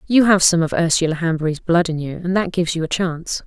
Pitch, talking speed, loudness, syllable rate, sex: 170 Hz, 260 wpm, -18 LUFS, 6.5 syllables/s, female